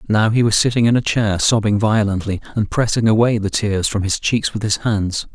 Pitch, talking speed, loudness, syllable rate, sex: 105 Hz, 225 wpm, -17 LUFS, 5.2 syllables/s, male